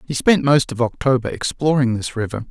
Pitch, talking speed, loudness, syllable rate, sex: 130 Hz, 190 wpm, -18 LUFS, 5.6 syllables/s, male